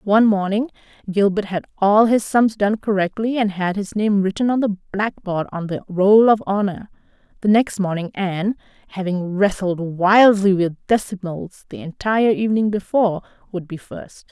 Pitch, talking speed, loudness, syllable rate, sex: 200 Hz, 160 wpm, -19 LUFS, 4.8 syllables/s, female